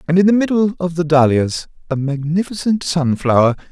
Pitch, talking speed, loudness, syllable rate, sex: 160 Hz, 160 wpm, -16 LUFS, 5.4 syllables/s, male